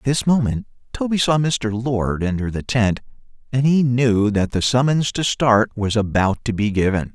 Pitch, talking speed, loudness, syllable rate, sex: 120 Hz, 195 wpm, -19 LUFS, 4.6 syllables/s, male